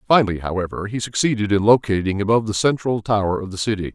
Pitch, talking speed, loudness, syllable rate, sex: 105 Hz, 200 wpm, -20 LUFS, 6.9 syllables/s, male